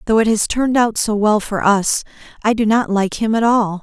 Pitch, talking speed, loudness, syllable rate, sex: 215 Hz, 250 wpm, -16 LUFS, 5.2 syllables/s, female